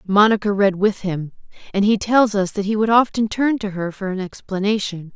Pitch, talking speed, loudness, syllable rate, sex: 200 Hz, 210 wpm, -19 LUFS, 5.2 syllables/s, female